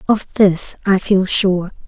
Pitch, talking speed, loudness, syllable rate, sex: 190 Hz, 160 wpm, -15 LUFS, 3.7 syllables/s, female